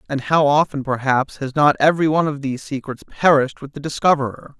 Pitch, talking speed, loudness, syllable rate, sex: 145 Hz, 195 wpm, -18 LUFS, 6.3 syllables/s, male